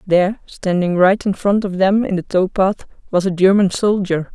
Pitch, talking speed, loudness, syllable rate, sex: 190 Hz, 205 wpm, -16 LUFS, 4.8 syllables/s, female